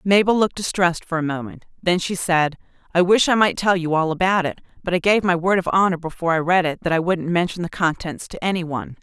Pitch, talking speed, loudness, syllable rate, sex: 175 Hz, 255 wpm, -20 LUFS, 6.3 syllables/s, female